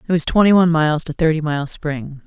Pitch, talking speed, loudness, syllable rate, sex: 160 Hz, 240 wpm, -17 LUFS, 6.2 syllables/s, female